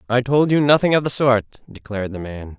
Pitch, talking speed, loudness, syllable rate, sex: 125 Hz, 230 wpm, -18 LUFS, 5.6 syllables/s, male